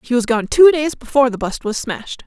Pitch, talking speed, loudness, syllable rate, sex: 250 Hz, 265 wpm, -16 LUFS, 6.1 syllables/s, female